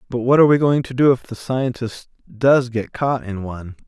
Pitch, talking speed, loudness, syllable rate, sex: 125 Hz, 230 wpm, -18 LUFS, 5.3 syllables/s, male